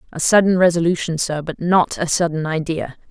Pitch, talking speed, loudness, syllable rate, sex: 165 Hz, 175 wpm, -18 LUFS, 5.5 syllables/s, female